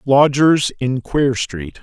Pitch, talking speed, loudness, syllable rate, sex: 130 Hz, 130 wpm, -16 LUFS, 2.9 syllables/s, male